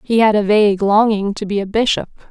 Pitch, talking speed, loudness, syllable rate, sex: 210 Hz, 235 wpm, -15 LUFS, 5.9 syllables/s, female